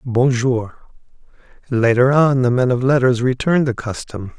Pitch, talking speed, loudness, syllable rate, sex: 125 Hz, 135 wpm, -17 LUFS, 4.8 syllables/s, male